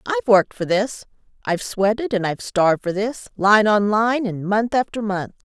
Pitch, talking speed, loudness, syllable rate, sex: 205 Hz, 195 wpm, -20 LUFS, 5.4 syllables/s, female